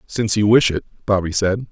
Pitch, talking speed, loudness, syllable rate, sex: 100 Hz, 210 wpm, -18 LUFS, 6.0 syllables/s, male